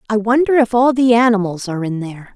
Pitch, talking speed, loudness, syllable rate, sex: 220 Hz, 230 wpm, -15 LUFS, 6.5 syllables/s, female